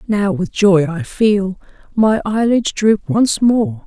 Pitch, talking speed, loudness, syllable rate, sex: 215 Hz, 155 wpm, -15 LUFS, 3.3 syllables/s, female